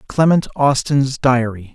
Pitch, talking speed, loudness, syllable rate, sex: 130 Hz, 105 wpm, -16 LUFS, 4.0 syllables/s, male